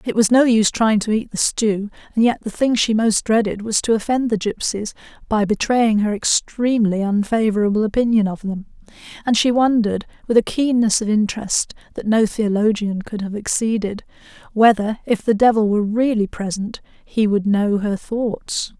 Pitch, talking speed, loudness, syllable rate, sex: 215 Hz, 175 wpm, -18 LUFS, 5.1 syllables/s, female